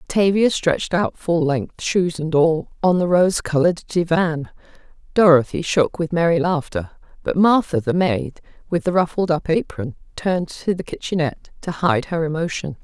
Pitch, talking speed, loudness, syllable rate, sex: 165 Hz, 165 wpm, -19 LUFS, 4.8 syllables/s, female